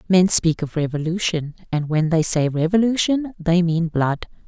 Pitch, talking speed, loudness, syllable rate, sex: 170 Hz, 160 wpm, -20 LUFS, 4.5 syllables/s, female